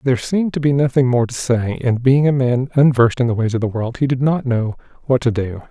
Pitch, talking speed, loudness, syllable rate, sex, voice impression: 125 Hz, 275 wpm, -17 LUFS, 6.1 syllables/s, male, masculine, very adult-like, slightly muffled, fluent, sincere, friendly, reassuring